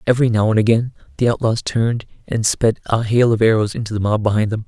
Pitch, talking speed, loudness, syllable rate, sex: 110 Hz, 230 wpm, -17 LUFS, 6.5 syllables/s, male